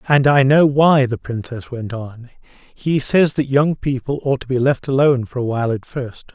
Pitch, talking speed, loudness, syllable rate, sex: 130 Hz, 220 wpm, -17 LUFS, 4.8 syllables/s, male